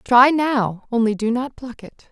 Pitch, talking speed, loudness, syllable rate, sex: 240 Hz, 170 wpm, -18 LUFS, 4.1 syllables/s, female